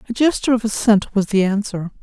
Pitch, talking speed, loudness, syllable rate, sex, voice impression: 215 Hz, 210 wpm, -18 LUFS, 6.3 syllables/s, female, feminine, adult-like, tensed, slightly dark, soft, fluent, intellectual, calm, elegant, slightly sharp, modest